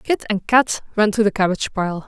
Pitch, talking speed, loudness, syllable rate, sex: 210 Hz, 230 wpm, -19 LUFS, 5.3 syllables/s, female